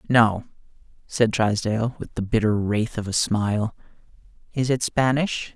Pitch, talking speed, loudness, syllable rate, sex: 115 Hz, 130 wpm, -23 LUFS, 4.6 syllables/s, male